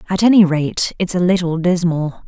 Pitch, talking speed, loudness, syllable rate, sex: 175 Hz, 185 wpm, -16 LUFS, 5.0 syllables/s, female